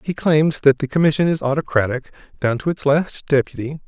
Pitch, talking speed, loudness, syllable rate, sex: 145 Hz, 185 wpm, -19 LUFS, 5.5 syllables/s, male